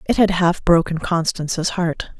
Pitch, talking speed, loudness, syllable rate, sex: 170 Hz, 165 wpm, -19 LUFS, 4.4 syllables/s, female